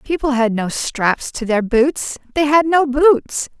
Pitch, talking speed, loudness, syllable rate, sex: 270 Hz, 185 wpm, -16 LUFS, 3.7 syllables/s, female